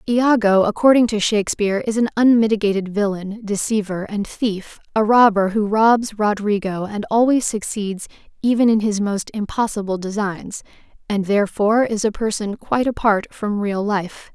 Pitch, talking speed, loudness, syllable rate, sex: 210 Hz, 145 wpm, -19 LUFS, 5.1 syllables/s, female